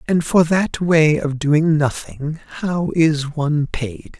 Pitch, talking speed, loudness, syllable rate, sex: 150 Hz, 155 wpm, -18 LUFS, 3.3 syllables/s, male